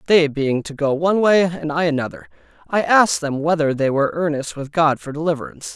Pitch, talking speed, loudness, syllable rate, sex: 155 Hz, 210 wpm, -19 LUFS, 6.0 syllables/s, male